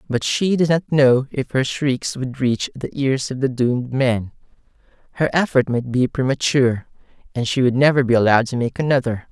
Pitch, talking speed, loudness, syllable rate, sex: 130 Hz, 195 wpm, -19 LUFS, 5.2 syllables/s, male